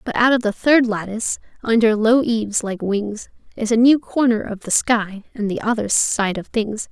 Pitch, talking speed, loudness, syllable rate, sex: 225 Hz, 210 wpm, -19 LUFS, 4.8 syllables/s, female